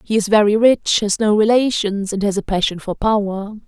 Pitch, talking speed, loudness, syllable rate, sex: 210 Hz, 210 wpm, -17 LUFS, 5.2 syllables/s, female